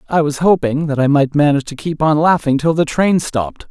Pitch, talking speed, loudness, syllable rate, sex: 150 Hz, 245 wpm, -15 LUFS, 5.7 syllables/s, male